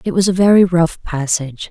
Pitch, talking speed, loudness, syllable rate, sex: 170 Hz, 210 wpm, -14 LUFS, 5.6 syllables/s, female